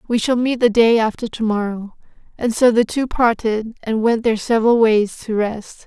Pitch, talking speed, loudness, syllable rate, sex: 225 Hz, 205 wpm, -17 LUFS, 4.8 syllables/s, female